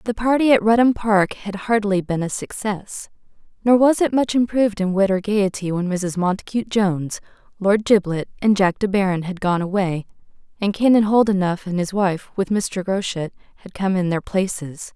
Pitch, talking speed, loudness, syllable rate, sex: 200 Hz, 180 wpm, -20 LUFS, 5.1 syllables/s, female